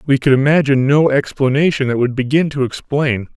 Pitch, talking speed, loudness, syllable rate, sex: 135 Hz, 175 wpm, -15 LUFS, 5.7 syllables/s, male